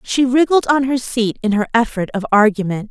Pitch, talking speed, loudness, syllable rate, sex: 230 Hz, 205 wpm, -16 LUFS, 5.2 syllables/s, female